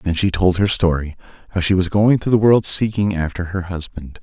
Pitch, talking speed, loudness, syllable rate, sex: 95 Hz, 215 wpm, -17 LUFS, 5.3 syllables/s, male